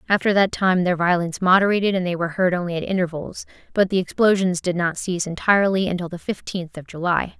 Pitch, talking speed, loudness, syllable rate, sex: 180 Hz, 205 wpm, -21 LUFS, 6.4 syllables/s, female